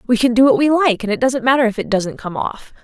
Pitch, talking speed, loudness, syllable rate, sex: 240 Hz, 320 wpm, -16 LUFS, 6.2 syllables/s, female